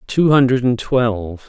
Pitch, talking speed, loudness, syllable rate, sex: 120 Hz, 120 wpm, -16 LUFS, 3.8 syllables/s, male